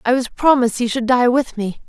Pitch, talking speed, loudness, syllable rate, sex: 245 Hz, 255 wpm, -17 LUFS, 5.8 syllables/s, female